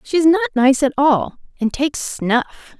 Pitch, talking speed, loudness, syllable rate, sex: 285 Hz, 195 wpm, -17 LUFS, 4.4 syllables/s, female